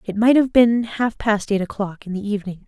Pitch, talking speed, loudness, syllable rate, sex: 215 Hz, 245 wpm, -19 LUFS, 5.5 syllables/s, female